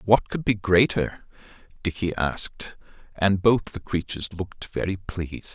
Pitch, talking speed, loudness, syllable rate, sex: 95 Hz, 140 wpm, -25 LUFS, 4.7 syllables/s, male